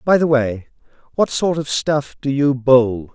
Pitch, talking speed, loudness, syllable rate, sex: 135 Hz, 190 wpm, -17 LUFS, 4.0 syllables/s, male